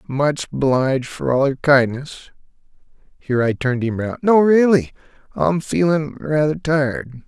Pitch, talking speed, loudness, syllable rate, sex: 140 Hz, 105 wpm, -18 LUFS, 4.3 syllables/s, male